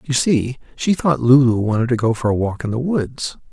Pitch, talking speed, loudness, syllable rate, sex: 130 Hz, 240 wpm, -18 LUFS, 5.1 syllables/s, male